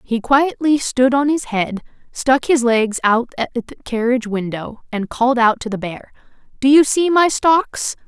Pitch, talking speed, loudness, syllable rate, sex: 250 Hz, 185 wpm, -17 LUFS, 4.3 syllables/s, female